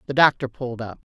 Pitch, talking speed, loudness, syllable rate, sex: 125 Hz, 215 wpm, -22 LUFS, 7.0 syllables/s, female